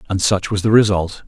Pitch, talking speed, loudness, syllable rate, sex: 100 Hz, 235 wpm, -16 LUFS, 5.6 syllables/s, male